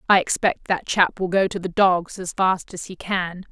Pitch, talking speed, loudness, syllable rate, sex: 185 Hz, 240 wpm, -21 LUFS, 4.6 syllables/s, female